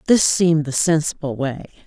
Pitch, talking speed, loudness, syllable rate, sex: 155 Hz, 160 wpm, -18 LUFS, 5.1 syllables/s, female